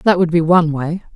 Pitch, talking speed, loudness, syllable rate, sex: 165 Hz, 260 wpm, -15 LUFS, 5.9 syllables/s, female